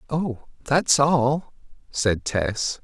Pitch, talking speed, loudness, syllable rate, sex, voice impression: 130 Hz, 85 wpm, -22 LUFS, 2.5 syllables/s, male, masculine, very adult-like, slightly thick, tensed, slightly powerful, very bright, soft, very clear, fluent, slightly raspy, cool, intellectual, very refreshing, sincere, calm, mature, very friendly, very reassuring, very unique, slightly elegant, wild, slightly sweet, very lively, kind, intense, light